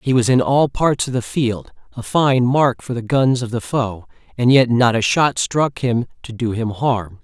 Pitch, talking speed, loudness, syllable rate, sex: 125 Hz, 230 wpm, -17 LUFS, 4.3 syllables/s, male